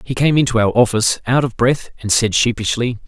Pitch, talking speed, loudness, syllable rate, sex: 120 Hz, 215 wpm, -16 LUFS, 5.8 syllables/s, male